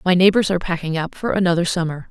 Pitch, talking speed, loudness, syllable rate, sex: 175 Hz, 230 wpm, -19 LUFS, 7.0 syllables/s, female